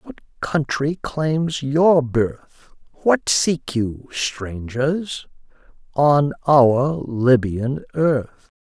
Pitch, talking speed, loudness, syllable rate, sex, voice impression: 140 Hz, 90 wpm, -20 LUFS, 2.2 syllables/s, male, very masculine, very adult-like, slightly old, very thick, tensed, powerful, slightly dark, hard, clear, fluent, cool, very intellectual, very sincere, very calm, mature, slightly friendly, slightly reassuring, very unique, elegant, slightly wild, slightly lively, kind, very modest